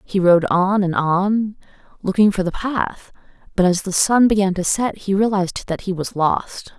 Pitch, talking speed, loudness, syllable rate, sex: 190 Hz, 195 wpm, -18 LUFS, 4.5 syllables/s, female